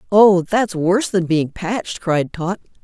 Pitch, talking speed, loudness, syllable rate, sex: 185 Hz, 170 wpm, -18 LUFS, 4.2 syllables/s, female